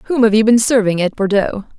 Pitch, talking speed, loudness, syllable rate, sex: 215 Hz, 235 wpm, -14 LUFS, 5.5 syllables/s, female